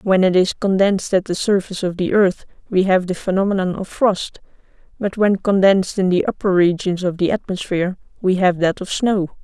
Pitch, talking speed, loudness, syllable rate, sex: 190 Hz, 195 wpm, -18 LUFS, 5.5 syllables/s, female